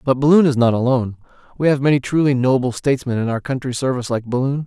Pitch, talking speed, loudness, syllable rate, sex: 130 Hz, 220 wpm, -18 LUFS, 7.0 syllables/s, male